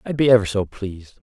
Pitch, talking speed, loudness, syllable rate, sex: 105 Hz, 235 wpm, -18 LUFS, 6.4 syllables/s, male